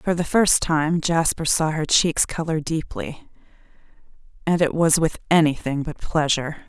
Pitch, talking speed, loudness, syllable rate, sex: 160 Hz, 155 wpm, -21 LUFS, 4.5 syllables/s, female